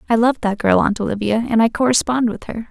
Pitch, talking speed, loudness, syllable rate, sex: 225 Hz, 245 wpm, -17 LUFS, 6.5 syllables/s, female